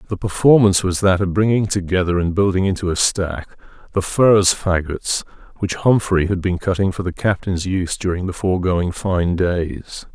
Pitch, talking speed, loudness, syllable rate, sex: 95 Hz, 170 wpm, -18 LUFS, 5.0 syllables/s, male